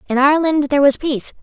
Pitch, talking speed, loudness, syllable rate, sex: 285 Hz, 210 wpm, -15 LUFS, 7.6 syllables/s, female